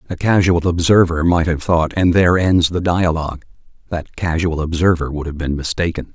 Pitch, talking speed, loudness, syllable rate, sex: 85 Hz, 175 wpm, -17 LUFS, 5.3 syllables/s, male